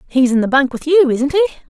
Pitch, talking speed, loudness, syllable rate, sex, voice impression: 285 Hz, 275 wpm, -14 LUFS, 5.8 syllables/s, female, feminine, adult-like, slightly relaxed, powerful, slightly muffled, slightly raspy, calm, unique, elegant, lively, slightly sharp, modest